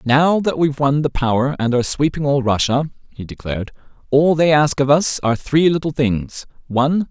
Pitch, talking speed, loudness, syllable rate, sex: 140 Hz, 195 wpm, -17 LUFS, 5.4 syllables/s, male